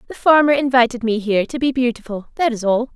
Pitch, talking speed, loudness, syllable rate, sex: 245 Hz, 225 wpm, -17 LUFS, 6.5 syllables/s, female